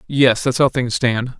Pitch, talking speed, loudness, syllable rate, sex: 125 Hz, 170 wpm, -17 LUFS, 4.1 syllables/s, male